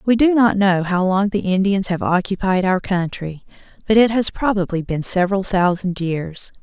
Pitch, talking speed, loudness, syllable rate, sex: 190 Hz, 180 wpm, -18 LUFS, 4.8 syllables/s, female